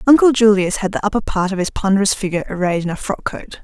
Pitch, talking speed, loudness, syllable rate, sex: 200 Hz, 250 wpm, -17 LUFS, 6.8 syllables/s, female